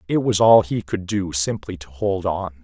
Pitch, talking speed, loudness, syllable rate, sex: 95 Hz, 230 wpm, -20 LUFS, 4.6 syllables/s, male